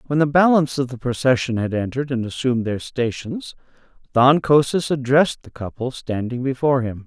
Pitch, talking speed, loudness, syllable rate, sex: 130 Hz, 170 wpm, -20 LUFS, 5.8 syllables/s, male